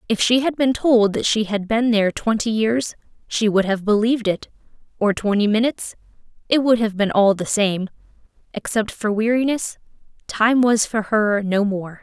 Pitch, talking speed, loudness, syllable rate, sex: 220 Hz, 170 wpm, -19 LUFS, 4.9 syllables/s, female